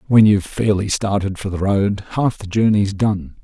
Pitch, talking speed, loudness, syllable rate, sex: 100 Hz, 190 wpm, -18 LUFS, 4.8 syllables/s, male